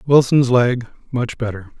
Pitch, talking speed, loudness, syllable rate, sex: 120 Hz, 135 wpm, -18 LUFS, 4.3 syllables/s, male